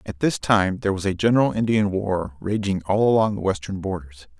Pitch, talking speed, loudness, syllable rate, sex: 100 Hz, 205 wpm, -22 LUFS, 5.6 syllables/s, male